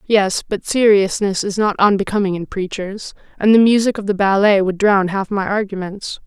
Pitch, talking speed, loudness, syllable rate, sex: 200 Hz, 180 wpm, -16 LUFS, 5.0 syllables/s, female